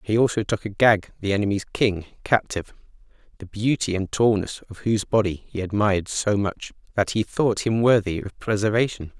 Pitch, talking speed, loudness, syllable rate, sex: 105 Hz, 165 wpm, -23 LUFS, 5.4 syllables/s, male